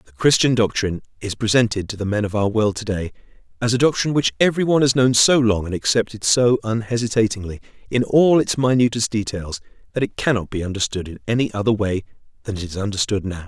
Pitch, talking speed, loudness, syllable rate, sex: 110 Hz, 200 wpm, -19 LUFS, 6.3 syllables/s, male